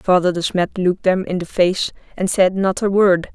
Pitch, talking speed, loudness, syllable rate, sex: 185 Hz, 235 wpm, -18 LUFS, 4.9 syllables/s, female